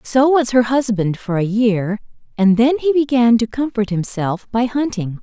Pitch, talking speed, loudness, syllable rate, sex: 230 Hz, 185 wpm, -17 LUFS, 4.5 syllables/s, female